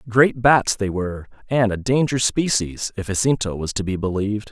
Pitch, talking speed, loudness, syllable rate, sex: 110 Hz, 185 wpm, -20 LUFS, 5.4 syllables/s, male